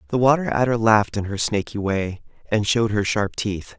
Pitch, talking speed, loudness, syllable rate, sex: 105 Hz, 205 wpm, -21 LUFS, 5.4 syllables/s, male